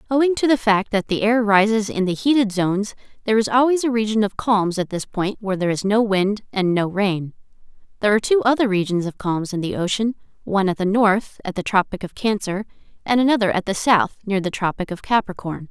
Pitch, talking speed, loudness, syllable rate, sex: 205 Hz, 225 wpm, -20 LUFS, 6.0 syllables/s, female